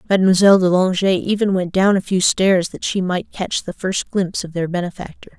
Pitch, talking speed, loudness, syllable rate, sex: 185 Hz, 210 wpm, -17 LUFS, 5.6 syllables/s, female